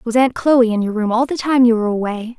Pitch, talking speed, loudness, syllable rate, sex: 235 Hz, 300 wpm, -16 LUFS, 6.0 syllables/s, female